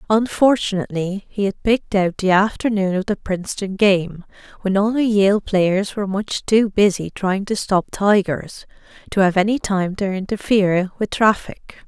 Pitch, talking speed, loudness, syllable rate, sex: 200 Hz, 160 wpm, -19 LUFS, 4.7 syllables/s, female